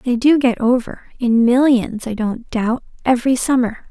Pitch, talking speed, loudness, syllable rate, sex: 245 Hz, 170 wpm, -17 LUFS, 4.7 syllables/s, female